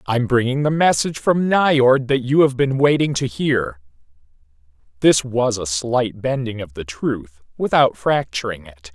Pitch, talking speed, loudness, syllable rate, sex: 120 Hz, 160 wpm, -18 LUFS, 4.4 syllables/s, male